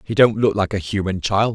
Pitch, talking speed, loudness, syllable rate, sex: 100 Hz, 270 wpm, -19 LUFS, 5.3 syllables/s, male